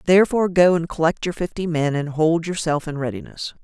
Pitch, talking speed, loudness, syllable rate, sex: 165 Hz, 200 wpm, -20 LUFS, 5.9 syllables/s, female